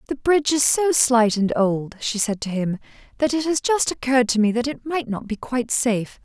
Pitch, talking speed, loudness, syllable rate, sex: 245 Hz, 240 wpm, -21 LUFS, 5.4 syllables/s, female